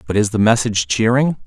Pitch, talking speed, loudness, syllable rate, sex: 110 Hz, 205 wpm, -16 LUFS, 6.2 syllables/s, male